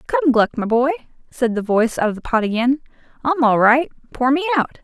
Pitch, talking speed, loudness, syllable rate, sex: 255 Hz, 225 wpm, -18 LUFS, 6.3 syllables/s, female